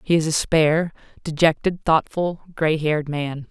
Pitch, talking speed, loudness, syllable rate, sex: 155 Hz, 155 wpm, -21 LUFS, 4.7 syllables/s, female